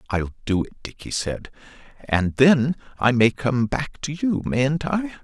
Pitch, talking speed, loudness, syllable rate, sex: 135 Hz, 170 wpm, -22 LUFS, 3.9 syllables/s, male